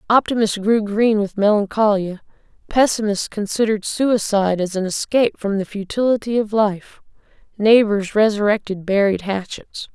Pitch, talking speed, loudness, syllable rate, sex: 210 Hz, 120 wpm, -18 LUFS, 5.0 syllables/s, female